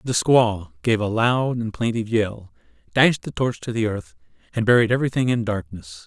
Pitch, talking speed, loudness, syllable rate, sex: 110 Hz, 190 wpm, -21 LUFS, 5.1 syllables/s, male